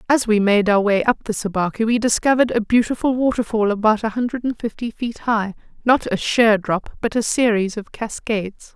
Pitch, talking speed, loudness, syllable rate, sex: 220 Hz, 190 wpm, -19 LUFS, 5.3 syllables/s, female